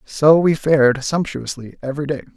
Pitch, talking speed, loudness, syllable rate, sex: 145 Hz, 155 wpm, -17 LUFS, 5.3 syllables/s, male